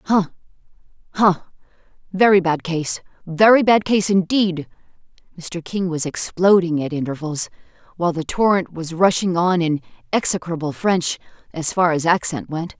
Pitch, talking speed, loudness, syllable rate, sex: 175 Hz, 125 wpm, -19 LUFS, 4.7 syllables/s, female